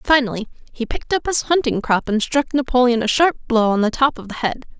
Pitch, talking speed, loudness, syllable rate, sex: 250 Hz, 240 wpm, -18 LUFS, 5.9 syllables/s, female